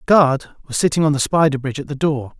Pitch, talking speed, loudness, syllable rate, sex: 145 Hz, 275 wpm, -18 LUFS, 7.1 syllables/s, male